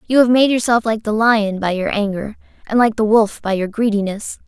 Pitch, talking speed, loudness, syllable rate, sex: 215 Hz, 230 wpm, -16 LUFS, 5.3 syllables/s, female